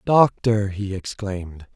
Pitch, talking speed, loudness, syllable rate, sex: 105 Hz, 105 wpm, -22 LUFS, 3.7 syllables/s, male